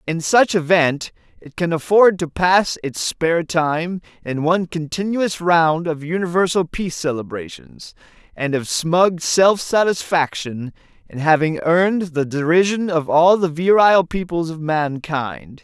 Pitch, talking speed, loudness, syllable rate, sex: 165 Hz, 140 wpm, -18 LUFS, 4.2 syllables/s, male